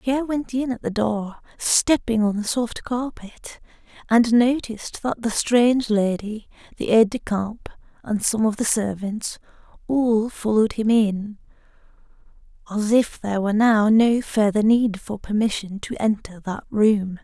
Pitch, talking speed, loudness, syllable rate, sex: 220 Hz, 155 wpm, -21 LUFS, 4.4 syllables/s, female